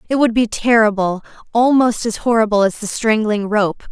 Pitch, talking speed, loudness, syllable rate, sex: 220 Hz, 155 wpm, -16 LUFS, 5.1 syllables/s, female